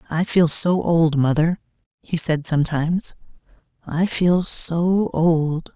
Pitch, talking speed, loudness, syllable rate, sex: 165 Hz, 125 wpm, -19 LUFS, 3.6 syllables/s, female